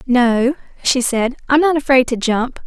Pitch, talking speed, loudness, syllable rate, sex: 255 Hz, 180 wpm, -16 LUFS, 4.2 syllables/s, female